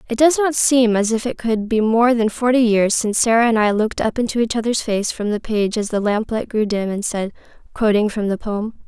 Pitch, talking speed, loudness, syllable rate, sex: 220 Hz, 250 wpm, -18 LUFS, 5.5 syllables/s, female